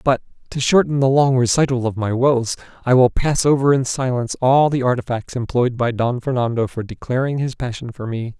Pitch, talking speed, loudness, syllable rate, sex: 125 Hz, 200 wpm, -18 LUFS, 5.7 syllables/s, male